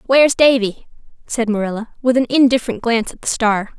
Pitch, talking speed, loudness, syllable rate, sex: 235 Hz, 175 wpm, -16 LUFS, 6.1 syllables/s, female